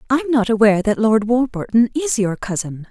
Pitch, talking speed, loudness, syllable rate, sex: 225 Hz, 185 wpm, -17 LUFS, 5.3 syllables/s, female